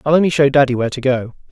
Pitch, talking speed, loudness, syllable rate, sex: 135 Hz, 275 wpm, -15 LUFS, 7.8 syllables/s, male